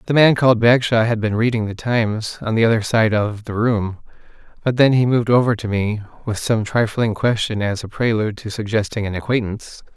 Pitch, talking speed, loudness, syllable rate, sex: 110 Hz, 205 wpm, -18 LUFS, 5.8 syllables/s, male